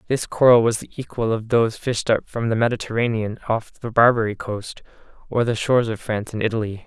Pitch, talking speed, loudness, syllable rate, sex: 115 Hz, 200 wpm, -21 LUFS, 5.9 syllables/s, male